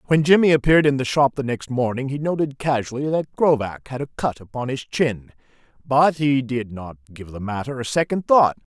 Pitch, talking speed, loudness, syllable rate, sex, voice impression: 130 Hz, 205 wpm, -20 LUFS, 5.5 syllables/s, male, very masculine, very adult-like, very middle-aged, very thick, tensed, powerful, bright, very hard, clear, fluent, raspy, cool, intellectual, very sincere, slightly calm, very mature, friendly, reassuring, unique, very elegant, slightly wild, sweet, lively, kind, slightly intense